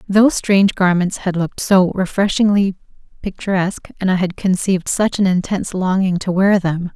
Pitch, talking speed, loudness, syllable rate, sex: 190 Hz, 165 wpm, -17 LUFS, 5.5 syllables/s, female